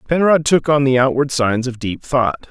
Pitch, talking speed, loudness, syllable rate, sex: 135 Hz, 215 wpm, -16 LUFS, 5.0 syllables/s, male